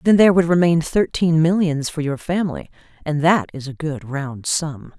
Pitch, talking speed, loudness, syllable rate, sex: 160 Hz, 190 wpm, -19 LUFS, 4.9 syllables/s, female